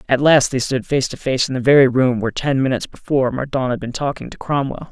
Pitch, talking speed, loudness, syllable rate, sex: 130 Hz, 255 wpm, -18 LUFS, 6.3 syllables/s, male